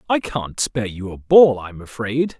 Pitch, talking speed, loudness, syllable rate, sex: 120 Hz, 200 wpm, -18 LUFS, 4.6 syllables/s, male